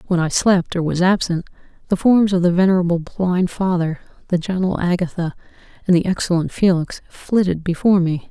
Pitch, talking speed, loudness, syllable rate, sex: 180 Hz, 165 wpm, -18 LUFS, 5.4 syllables/s, female